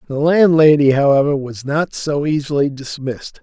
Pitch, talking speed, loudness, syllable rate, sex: 145 Hz, 140 wpm, -15 LUFS, 4.9 syllables/s, male